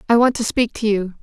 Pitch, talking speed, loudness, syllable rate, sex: 225 Hz, 295 wpm, -18 LUFS, 5.9 syllables/s, female